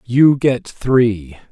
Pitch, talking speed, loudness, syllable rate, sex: 120 Hz, 120 wpm, -15 LUFS, 2.3 syllables/s, male